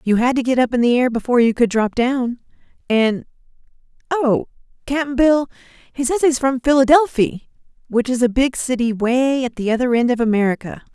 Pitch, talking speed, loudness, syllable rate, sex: 250 Hz, 180 wpm, -17 LUFS, 5.6 syllables/s, female